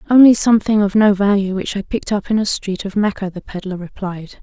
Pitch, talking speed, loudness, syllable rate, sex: 200 Hz, 230 wpm, -16 LUFS, 6.0 syllables/s, female